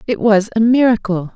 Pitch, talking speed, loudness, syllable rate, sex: 215 Hz, 175 wpm, -14 LUFS, 5.2 syllables/s, female